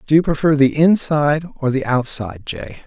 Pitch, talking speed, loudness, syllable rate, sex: 145 Hz, 190 wpm, -17 LUFS, 5.6 syllables/s, male